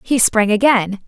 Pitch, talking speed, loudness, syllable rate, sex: 225 Hz, 170 wpm, -14 LUFS, 4.2 syllables/s, female